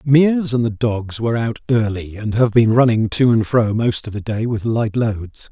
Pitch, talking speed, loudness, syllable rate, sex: 115 Hz, 230 wpm, -17 LUFS, 4.7 syllables/s, male